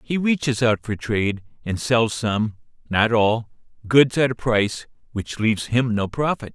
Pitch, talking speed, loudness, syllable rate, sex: 115 Hz, 175 wpm, -21 LUFS, 4.8 syllables/s, male